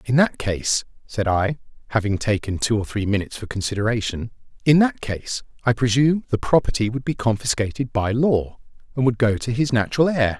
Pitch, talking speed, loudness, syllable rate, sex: 115 Hz, 180 wpm, -21 LUFS, 5.6 syllables/s, male